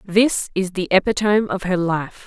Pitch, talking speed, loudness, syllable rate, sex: 190 Hz, 185 wpm, -19 LUFS, 4.8 syllables/s, female